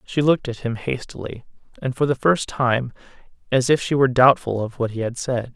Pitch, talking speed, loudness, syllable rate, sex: 125 Hz, 215 wpm, -21 LUFS, 5.6 syllables/s, male